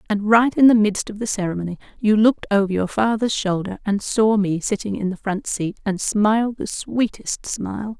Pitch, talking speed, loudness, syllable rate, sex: 210 Hz, 205 wpm, -20 LUFS, 5.1 syllables/s, female